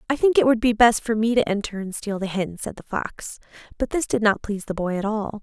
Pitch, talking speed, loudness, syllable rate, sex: 220 Hz, 285 wpm, -22 LUFS, 5.8 syllables/s, female